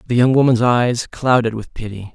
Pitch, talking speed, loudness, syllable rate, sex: 120 Hz, 195 wpm, -16 LUFS, 5.1 syllables/s, male